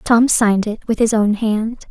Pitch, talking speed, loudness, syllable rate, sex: 220 Hz, 220 wpm, -16 LUFS, 4.5 syllables/s, female